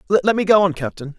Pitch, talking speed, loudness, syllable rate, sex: 185 Hz, 255 wpm, -17 LUFS, 5.9 syllables/s, male